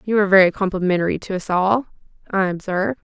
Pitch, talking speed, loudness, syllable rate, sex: 195 Hz, 175 wpm, -19 LUFS, 6.9 syllables/s, female